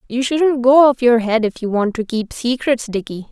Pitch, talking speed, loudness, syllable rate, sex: 240 Hz, 235 wpm, -16 LUFS, 4.8 syllables/s, female